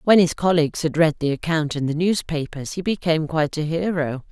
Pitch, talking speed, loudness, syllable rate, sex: 160 Hz, 210 wpm, -21 LUFS, 5.8 syllables/s, female